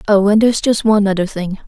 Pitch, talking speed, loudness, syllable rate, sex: 205 Hz, 250 wpm, -14 LUFS, 7.0 syllables/s, female